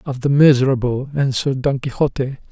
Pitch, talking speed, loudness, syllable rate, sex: 135 Hz, 145 wpm, -17 LUFS, 5.9 syllables/s, male